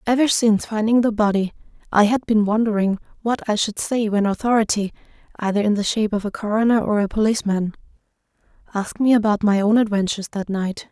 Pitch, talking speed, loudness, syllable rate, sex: 215 Hz, 180 wpm, -20 LUFS, 6.2 syllables/s, female